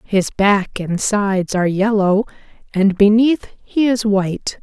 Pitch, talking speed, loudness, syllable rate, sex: 205 Hz, 145 wpm, -16 LUFS, 4.2 syllables/s, female